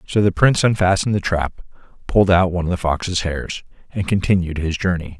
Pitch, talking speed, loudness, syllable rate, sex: 90 Hz, 195 wpm, -19 LUFS, 5.9 syllables/s, male